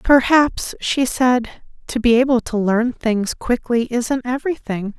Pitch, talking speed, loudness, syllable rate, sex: 245 Hz, 145 wpm, -18 LUFS, 4.1 syllables/s, female